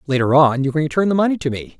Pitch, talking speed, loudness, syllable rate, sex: 150 Hz, 300 wpm, -17 LUFS, 7.3 syllables/s, male